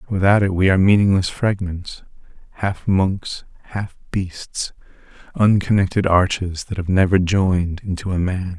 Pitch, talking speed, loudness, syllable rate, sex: 95 Hz, 135 wpm, -19 LUFS, 4.5 syllables/s, male